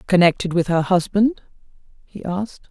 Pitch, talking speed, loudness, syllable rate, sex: 185 Hz, 135 wpm, -19 LUFS, 5.3 syllables/s, female